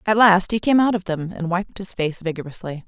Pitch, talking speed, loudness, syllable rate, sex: 185 Hz, 250 wpm, -20 LUFS, 5.5 syllables/s, female